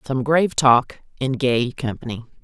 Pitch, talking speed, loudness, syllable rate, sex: 130 Hz, 150 wpm, -20 LUFS, 4.5 syllables/s, female